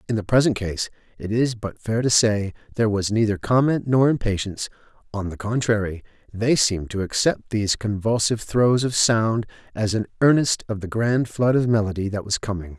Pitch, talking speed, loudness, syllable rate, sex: 110 Hz, 190 wpm, -22 LUFS, 5.4 syllables/s, male